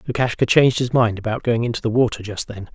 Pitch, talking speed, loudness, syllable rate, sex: 115 Hz, 240 wpm, -19 LUFS, 6.5 syllables/s, male